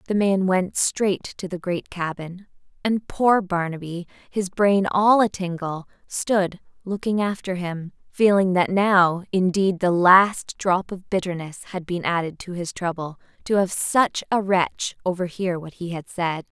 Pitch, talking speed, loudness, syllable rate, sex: 185 Hz, 160 wpm, -22 LUFS, 4.0 syllables/s, female